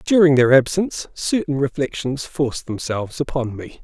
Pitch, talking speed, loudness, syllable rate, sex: 140 Hz, 140 wpm, -20 LUFS, 5.2 syllables/s, male